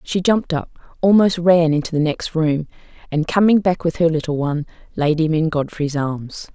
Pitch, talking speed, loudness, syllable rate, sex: 160 Hz, 195 wpm, -18 LUFS, 5.2 syllables/s, female